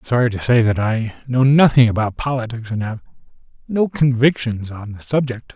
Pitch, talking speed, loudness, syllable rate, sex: 120 Hz, 195 wpm, -18 LUFS, 5.9 syllables/s, male